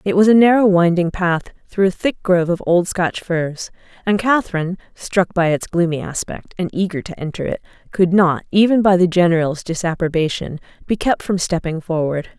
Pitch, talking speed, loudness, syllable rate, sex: 180 Hz, 185 wpm, -17 LUFS, 5.2 syllables/s, female